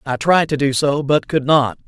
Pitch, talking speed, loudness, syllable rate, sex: 140 Hz, 255 wpm, -16 LUFS, 4.8 syllables/s, male